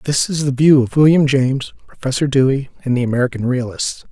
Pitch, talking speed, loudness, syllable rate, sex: 135 Hz, 190 wpm, -16 LUFS, 6.0 syllables/s, male